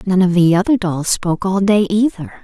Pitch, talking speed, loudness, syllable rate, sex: 190 Hz, 220 wpm, -15 LUFS, 5.2 syllables/s, female